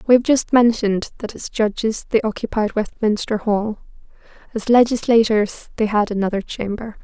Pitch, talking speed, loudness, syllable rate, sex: 220 Hz, 145 wpm, -19 LUFS, 5.0 syllables/s, female